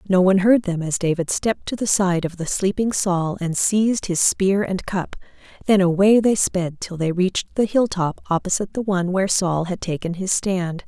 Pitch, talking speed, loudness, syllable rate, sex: 185 Hz, 210 wpm, -20 LUFS, 5.2 syllables/s, female